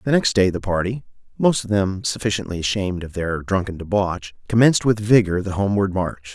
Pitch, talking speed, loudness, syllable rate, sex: 100 Hz, 190 wpm, -20 LUFS, 5.7 syllables/s, male